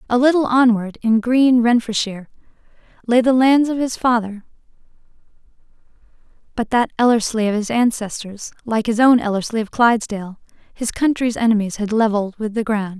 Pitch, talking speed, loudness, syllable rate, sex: 230 Hz, 150 wpm, -17 LUFS, 5.5 syllables/s, female